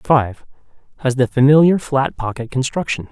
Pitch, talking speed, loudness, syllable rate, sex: 130 Hz, 135 wpm, -17 LUFS, 5.4 syllables/s, male